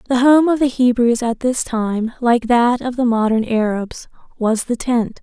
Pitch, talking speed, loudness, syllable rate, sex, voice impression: 240 Hz, 195 wpm, -17 LUFS, 4.3 syllables/s, female, feminine, tensed, bright, soft, clear, slightly raspy, intellectual, calm, friendly, reassuring, elegant, lively, kind, modest